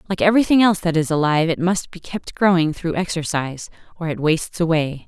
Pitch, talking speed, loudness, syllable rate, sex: 170 Hz, 200 wpm, -19 LUFS, 6.3 syllables/s, female